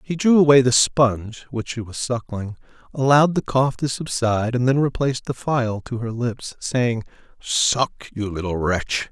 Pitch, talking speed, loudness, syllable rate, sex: 125 Hz, 180 wpm, -20 LUFS, 4.7 syllables/s, male